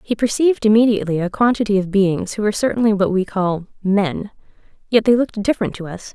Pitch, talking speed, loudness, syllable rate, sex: 210 Hz, 195 wpm, -18 LUFS, 6.4 syllables/s, female